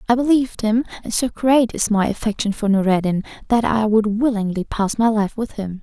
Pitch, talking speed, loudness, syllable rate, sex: 220 Hz, 205 wpm, -19 LUFS, 5.4 syllables/s, female